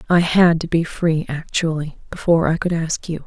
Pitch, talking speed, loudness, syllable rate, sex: 165 Hz, 200 wpm, -19 LUFS, 5.2 syllables/s, female